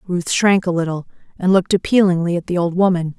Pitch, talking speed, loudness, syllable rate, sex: 180 Hz, 205 wpm, -17 LUFS, 6.2 syllables/s, female